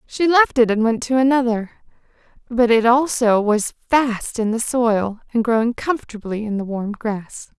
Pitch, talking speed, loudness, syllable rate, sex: 235 Hz, 175 wpm, -19 LUFS, 4.5 syllables/s, female